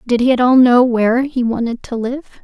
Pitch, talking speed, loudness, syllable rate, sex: 245 Hz, 245 wpm, -14 LUFS, 5.2 syllables/s, female